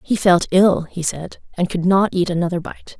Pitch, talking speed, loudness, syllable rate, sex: 180 Hz, 220 wpm, -18 LUFS, 4.8 syllables/s, female